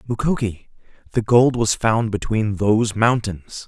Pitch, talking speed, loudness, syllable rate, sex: 110 Hz, 115 wpm, -19 LUFS, 4.3 syllables/s, male